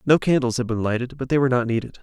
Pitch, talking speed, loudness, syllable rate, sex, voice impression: 125 Hz, 295 wpm, -21 LUFS, 7.4 syllables/s, male, masculine, adult-like, tensed, powerful, hard, fluent, cool, intellectual, wild, lively, intense, slightly sharp, light